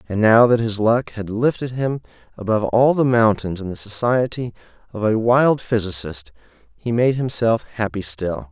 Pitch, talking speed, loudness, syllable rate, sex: 110 Hz, 170 wpm, -19 LUFS, 4.8 syllables/s, male